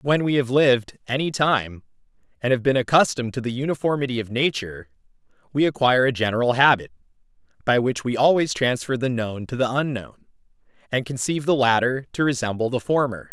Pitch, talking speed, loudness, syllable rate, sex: 130 Hz, 170 wpm, -22 LUFS, 5.9 syllables/s, male